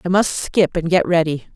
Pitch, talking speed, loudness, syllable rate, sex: 170 Hz, 230 wpm, -18 LUFS, 5.0 syllables/s, female